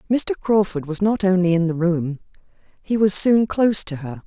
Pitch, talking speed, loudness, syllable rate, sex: 190 Hz, 185 wpm, -19 LUFS, 5.1 syllables/s, female